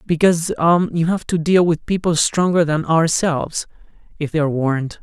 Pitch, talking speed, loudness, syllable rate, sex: 160 Hz, 165 wpm, -18 LUFS, 5.6 syllables/s, male